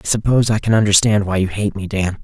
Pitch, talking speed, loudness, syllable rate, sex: 105 Hz, 270 wpm, -16 LUFS, 6.6 syllables/s, male